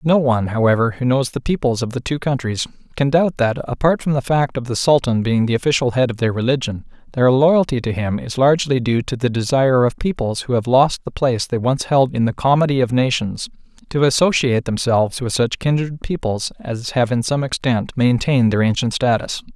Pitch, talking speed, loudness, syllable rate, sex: 125 Hz, 210 wpm, -18 LUFS, 5.6 syllables/s, male